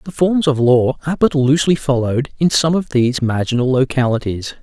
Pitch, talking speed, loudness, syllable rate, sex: 135 Hz, 180 wpm, -16 LUFS, 5.8 syllables/s, male